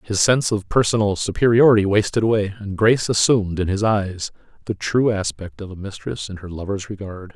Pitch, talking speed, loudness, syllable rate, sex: 100 Hz, 190 wpm, -19 LUFS, 5.7 syllables/s, male